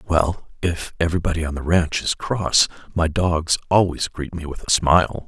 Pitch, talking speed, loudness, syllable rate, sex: 85 Hz, 180 wpm, -21 LUFS, 4.8 syllables/s, male